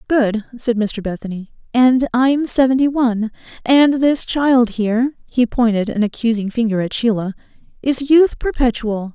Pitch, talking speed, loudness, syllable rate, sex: 240 Hz, 130 wpm, -17 LUFS, 4.7 syllables/s, female